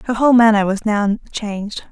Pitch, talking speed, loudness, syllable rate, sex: 215 Hz, 190 wpm, -16 LUFS, 5.6 syllables/s, female